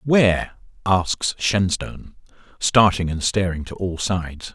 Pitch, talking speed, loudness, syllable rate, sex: 95 Hz, 120 wpm, -21 LUFS, 4.0 syllables/s, male